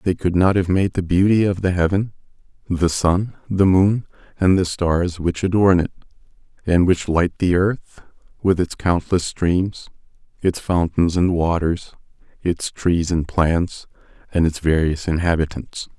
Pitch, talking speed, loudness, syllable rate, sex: 90 Hz, 155 wpm, -19 LUFS, 4.2 syllables/s, male